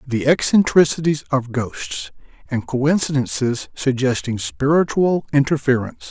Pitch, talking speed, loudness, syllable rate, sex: 130 Hz, 90 wpm, -19 LUFS, 4.4 syllables/s, male